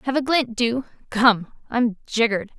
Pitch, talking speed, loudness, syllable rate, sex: 235 Hz, 160 wpm, -21 LUFS, 4.7 syllables/s, female